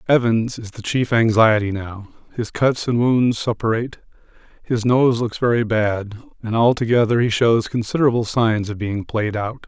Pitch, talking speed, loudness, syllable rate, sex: 115 Hz, 160 wpm, -19 LUFS, 4.8 syllables/s, male